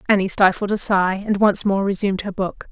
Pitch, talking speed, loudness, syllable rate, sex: 195 Hz, 220 wpm, -19 LUFS, 5.7 syllables/s, female